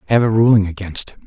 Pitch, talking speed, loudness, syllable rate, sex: 105 Hz, 240 wpm, -16 LUFS, 7.1 syllables/s, male